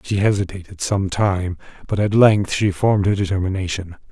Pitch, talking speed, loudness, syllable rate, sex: 95 Hz, 160 wpm, -19 LUFS, 5.3 syllables/s, male